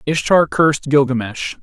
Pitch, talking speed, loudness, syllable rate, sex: 145 Hz, 110 wpm, -16 LUFS, 4.8 syllables/s, male